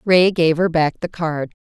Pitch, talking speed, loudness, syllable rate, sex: 165 Hz, 220 wpm, -18 LUFS, 4.4 syllables/s, female